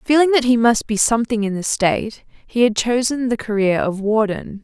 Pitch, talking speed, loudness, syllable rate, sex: 225 Hz, 205 wpm, -18 LUFS, 5.2 syllables/s, female